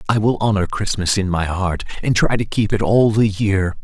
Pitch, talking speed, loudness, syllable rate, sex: 100 Hz, 235 wpm, -18 LUFS, 5.0 syllables/s, male